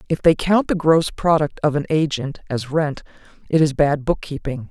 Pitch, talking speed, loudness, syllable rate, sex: 150 Hz, 190 wpm, -19 LUFS, 4.9 syllables/s, female